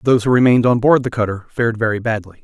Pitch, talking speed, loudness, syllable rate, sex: 115 Hz, 245 wpm, -16 LUFS, 7.6 syllables/s, male